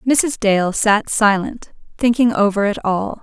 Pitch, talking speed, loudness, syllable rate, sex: 215 Hz, 150 wpm, -16 LUFS, 3.9 syllables/s, female